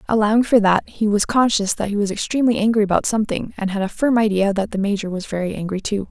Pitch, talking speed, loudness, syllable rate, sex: 210 Hz, 245 wpm, -19 LUFS, 6.7 syllables/s, female